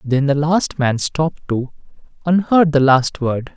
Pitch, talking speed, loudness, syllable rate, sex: 145 Hz, 185 wpm, -17 LUFS, 4.3 syllables/s, male